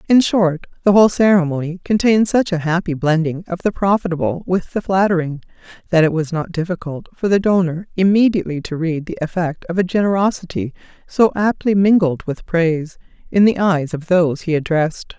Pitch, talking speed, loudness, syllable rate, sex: 180 Hz, 175 wpm, -17 LUFS, 5.6 syllables/s, female